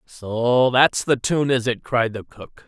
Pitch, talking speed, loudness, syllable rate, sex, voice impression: 120 Hz, 200 wpm, -20 LUFS, 3.6 syllables/s, male, masculine, slightly old, tensed, powerful, clear, slightly halting, raspy, mature, wild, strict, intense, sharp